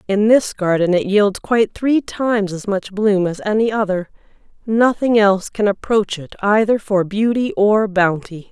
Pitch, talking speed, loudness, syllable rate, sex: 205 Hz, 170 wpm, -17 LUFS, 4.5 syllables/s, female